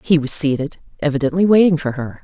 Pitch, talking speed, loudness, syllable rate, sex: 150 Hz, 190 wpm, -17 LUFS, 6.2 syllables/s, female